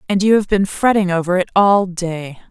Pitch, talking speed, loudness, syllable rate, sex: 185 Hz, 215 wpm, -16 LUFS, 5.0 syllables/s, female